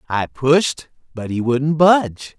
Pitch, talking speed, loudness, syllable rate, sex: 140 Hz, 150 wpm, -17 LUFS, 3.8 syllables/s, male